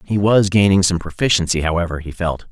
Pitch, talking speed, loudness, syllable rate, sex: 95 Hz, 190 wpm, -17 LUFS, 5.8 syllables/s, male